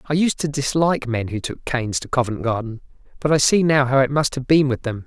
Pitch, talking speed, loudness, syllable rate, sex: 135 Hz, 260 wpm, -20 LUFS, 5.9 syllables/s, male